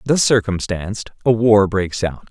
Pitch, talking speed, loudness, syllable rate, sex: 105 Hz, 155 wpm, -17 LUFS, 4.5 syllables/s, male